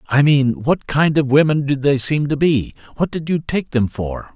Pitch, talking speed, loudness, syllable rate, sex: 145 Hz, 235 wpm, -17 LUFS, 4.5 syllables/s, male